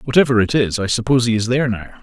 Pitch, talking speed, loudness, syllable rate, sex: 120 Hz, 265 wpm, -17 LUFS, 7.0 syllables/s, male